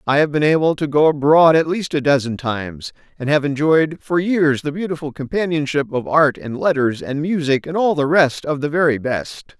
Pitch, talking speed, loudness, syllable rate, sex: 150 Hz, 215 wpm, -18 LUFS, 5.2 syllables/s, male